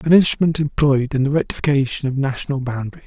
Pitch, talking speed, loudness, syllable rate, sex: 140 Hz, 175 wpm, -19 LUFS, 6.7 syllables/s, male